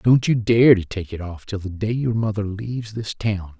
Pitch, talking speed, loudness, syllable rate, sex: 105 Hz, 250 wpm, -21 LUFS, 4.9 syllables/s, male